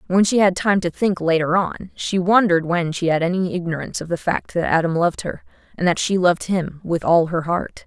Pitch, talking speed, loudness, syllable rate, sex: 175 Hz, 235 wpm, -19 LUFS, 5.6 syllables/s, female